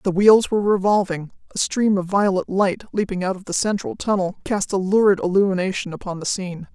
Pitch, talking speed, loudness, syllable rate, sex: 190 Hz, 195 wpm, -20 LUFS, 5.8 syllables/s, female